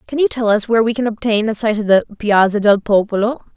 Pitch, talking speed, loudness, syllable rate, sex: 220 Hz, 255 wpm, -15 LUFS, 6.3 syllables/s, female